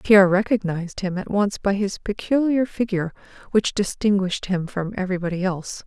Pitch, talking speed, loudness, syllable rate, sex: 195 Hz, 155 wpm, -22 LUFS, 5.8 syllables/s, female